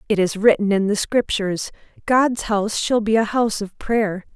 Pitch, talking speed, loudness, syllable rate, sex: 215 Hz, 195 wpm, -20 LUFS, 5.0 syllables/s, female